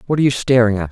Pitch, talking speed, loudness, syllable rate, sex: 120 Hz, 330 wpm, -15 LUFS, 8.8 syllables/s, male